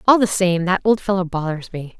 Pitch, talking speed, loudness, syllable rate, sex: 185 Hz, 240 wpm, -19 LUFS, 5.5 syllables/s, female